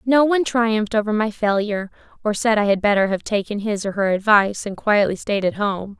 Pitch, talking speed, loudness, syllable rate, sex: 210 Hz, 220 wpm, -19 LUFS, 5.8 syllables/s, female